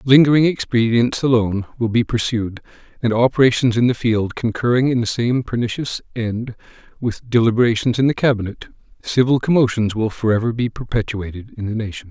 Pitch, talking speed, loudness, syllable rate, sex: 115 Hz, 155 wpm, -18 LUFS, 5.7 syllables/s, male